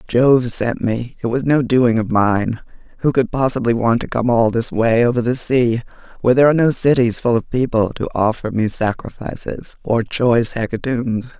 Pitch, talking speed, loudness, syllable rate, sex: 120 Hz, 190 wpm, -17 LUFS, 5.0 syllables/s, female